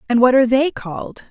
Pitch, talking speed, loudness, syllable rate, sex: 250 Hz, 230 wpm, -15 LUFS, 6.6 syllables/s, female